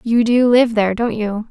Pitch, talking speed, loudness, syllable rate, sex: 225 Hz, 240 wpm, -15 LUFS, 5.0 syllables/s, female